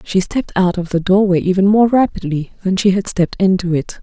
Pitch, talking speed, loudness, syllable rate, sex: 190 Hz, 225 wpm, -15 LUFS, 5.9 syllables/s, female